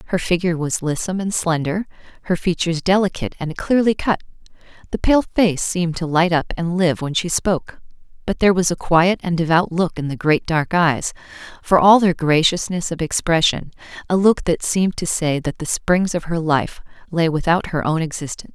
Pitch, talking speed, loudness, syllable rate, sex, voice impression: 170 Hz, 190 wpm, -19 LUFS, 5.4 syllables/s, female, very feminine, very adult-like, middle-aged, thin, tensed, slightly powerful, bright, slightly soft, very clear, fluent, cool, very intellectual, refreshing, very sincere, calm, friendly, reassuring, elegant, slightly sweet, lively, kind